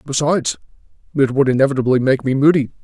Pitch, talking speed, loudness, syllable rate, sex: 135 Hz, 150 wpm, -16 LUFS, 6.8 syllables/s, male